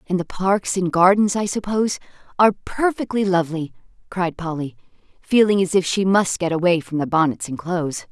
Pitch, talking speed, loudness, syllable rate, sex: 185 Hz, 180 wpm, -20 LUFS, 5.5 syllables/s, female